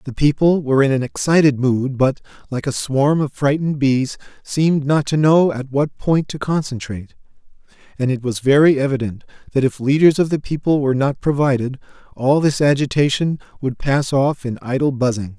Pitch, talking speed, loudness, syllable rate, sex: 140 Hz, 180 wpm, -18 LUFS, 5.3 syllables/s, male